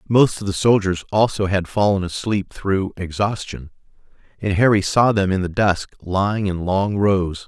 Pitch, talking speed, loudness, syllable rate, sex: 100 Hz, 170 wpm, -19 LUFS, 4.5 syllables/s, male